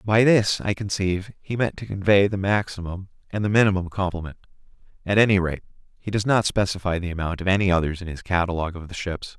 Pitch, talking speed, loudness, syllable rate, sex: 95 Hz, 205 wpm, -23 LUFS, 6.2 syllables/s, male